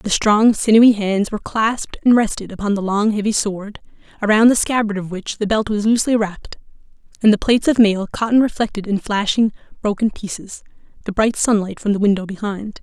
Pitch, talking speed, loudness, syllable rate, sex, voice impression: 210 Hz, 195 wpm, -17 LUFS, 5.8 syllables/s, female, feminine, adult-like, slightly clear, fluent, slightly refreshing, friendly